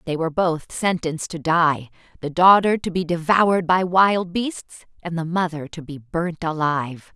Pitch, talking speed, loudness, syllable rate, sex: 170 Hz, 170 wpm, -20 LUFS, 4.7 syllables/s, female